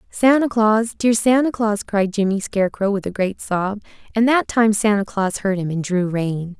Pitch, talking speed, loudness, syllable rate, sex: 210 Hz, 200 wpm, -19 LUFS, 4.7 syllables/s, female